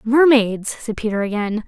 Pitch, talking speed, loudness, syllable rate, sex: 225 Hz, 145 wpm, -18 LUFS, 4.5 syllables/s, female